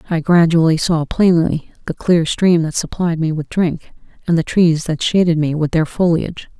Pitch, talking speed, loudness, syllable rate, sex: 165 Hz, 190 wpm, -16 LUFS, 4.8 syllables/s, female